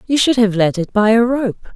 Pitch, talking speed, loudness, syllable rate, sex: 225 Hz, 275 wpm, -15 LUFS, 5.6 syllables/s, female